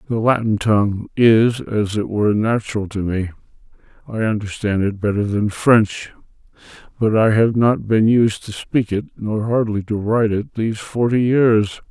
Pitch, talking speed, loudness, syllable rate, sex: 110 Hz, 165 wpm, -18 LUFS, 4.7 syllables/s, male